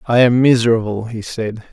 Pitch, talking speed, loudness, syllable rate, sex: 115 Hz, 175 wpm, -16 LUFS, 5.2 syllables/s, male